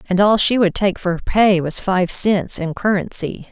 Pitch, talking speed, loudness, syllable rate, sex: 190 Hz, 205 wpm, -17 LUFS, 4.3 syllables/s, female